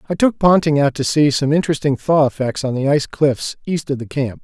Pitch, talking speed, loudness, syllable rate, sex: 145 Hz, 245 wpm, -17 LUFS, 5.8 syllables/s, male